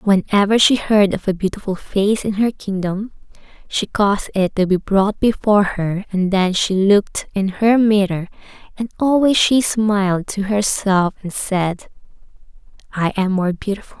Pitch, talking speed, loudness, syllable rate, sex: 200 Hz, 160 wpm, -17 LUFS, 4.5 syllables/s, female